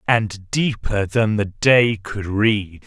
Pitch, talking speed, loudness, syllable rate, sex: 105 Hz, 145 wpm, -19 LUFS, 3.0 syllables/s, male